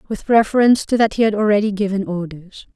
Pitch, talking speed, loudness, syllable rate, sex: 205 Hz, 195 wpm, -17 LUFS, 6.4 syllables/s, female